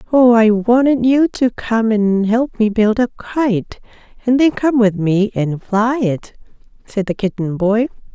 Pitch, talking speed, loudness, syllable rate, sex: 225 Hz, 175 wpm, -15 LUFS, 3.9 syllables/s, female